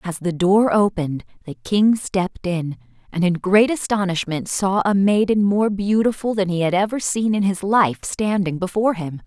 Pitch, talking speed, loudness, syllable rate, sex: 190 Hz, 180 wpm, -19 LUFS, 4.8 syllables/s, female